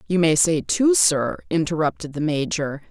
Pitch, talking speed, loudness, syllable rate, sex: 160 Hz, 165 wpm, -20 LUFS, 4.6 syllables/s, female